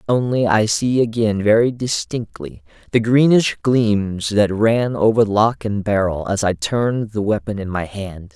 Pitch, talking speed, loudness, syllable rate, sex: 110 Hz, 165 wpm, -18 LUFS, 4.2 syllables/s, male